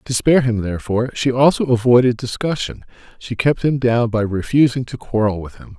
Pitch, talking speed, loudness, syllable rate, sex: 120 Hz, 185 wpm, -17 LUFS, 5.6 syllables/s, male